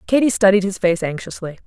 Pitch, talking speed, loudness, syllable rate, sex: 195 Hz, 180 wpm, -17 LUFS, 6.1 syllables/s, female